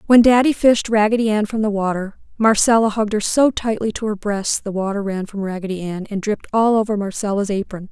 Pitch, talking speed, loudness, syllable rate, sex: 210 Hz, 210 wpm, -18 LUFS, 5.9 syllables/s, female